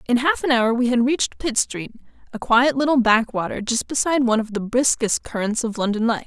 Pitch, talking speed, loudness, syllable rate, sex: 240 Hz, 220 wpm, -20 LUFS, 5.8 syllables/s, female